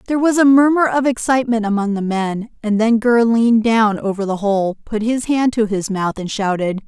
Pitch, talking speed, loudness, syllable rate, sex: 225 Hz, 220 wpm, -16 LUFS, 5.3 syllables/s, female